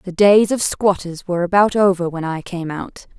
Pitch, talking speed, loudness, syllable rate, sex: 185 Hz, 205 wpm, -17 LUFS, 4.9 syllables/s, female